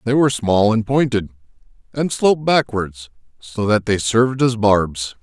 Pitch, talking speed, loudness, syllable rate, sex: 115 Hz, 160 wpm, -17 LUFS, 4.6 syllables/s, male